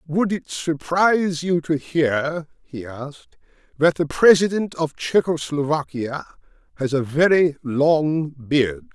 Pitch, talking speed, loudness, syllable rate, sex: 150 Hz, 125 wpm, -20 LUFS, 3.8 syllables/s, male